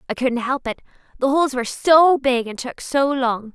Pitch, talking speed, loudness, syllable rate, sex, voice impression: 260 Hz, 220 wpm, -19 LUFS, 5.1 syllables/s, female, feminine, young, bright, slightly fluent, cute, refreshing, friendly, lively